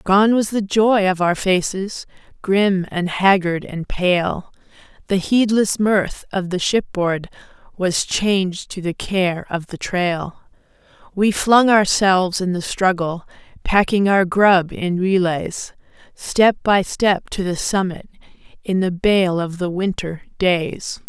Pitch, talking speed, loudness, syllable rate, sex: 190 Hz, 140 wpm, -18 LUFS, 3.6 syllables/s, female